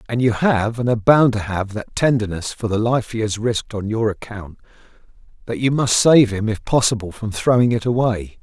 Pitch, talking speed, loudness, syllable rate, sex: 110 Hz, 215 wpm, -18 LUFS, 5.3 syllables/s, male